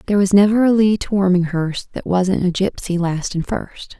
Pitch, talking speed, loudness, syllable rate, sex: 190 Hz, 210 wpm, -17 LUFS, 5.1 syllables/s, female